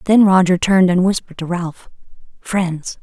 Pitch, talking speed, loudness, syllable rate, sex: 180 Hz, 160 wpm, -16 LUFS, 5.1 syllables/s, female